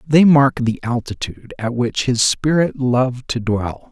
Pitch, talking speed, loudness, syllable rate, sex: 130 Hz, 170 wpm, -18 LUFS, 4.3 syllables/s, male